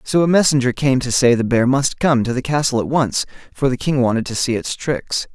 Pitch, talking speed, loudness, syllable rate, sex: 130 Hz, 260 wpm, -17 LUFS, 5.5 syllables/s, male